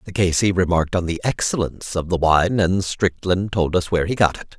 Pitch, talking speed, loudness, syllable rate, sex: 90 Hz, 235 wpm, -20 LUFS, 5.7 syllables/s, male